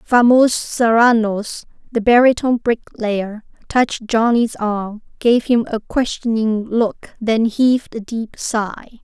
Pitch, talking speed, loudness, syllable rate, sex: 225 Hz, 120 wpm, -17 LUFS, 3.9 syllables/s, female